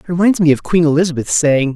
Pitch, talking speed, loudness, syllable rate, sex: 160 Hz, 240 wpm, -14 LUFS, 6.4 syllables/s, male